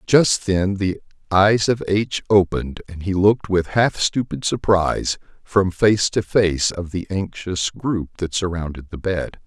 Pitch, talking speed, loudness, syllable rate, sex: 95 Hz, 165 wpm, -20 LUFS, 4.2 syllables/s, male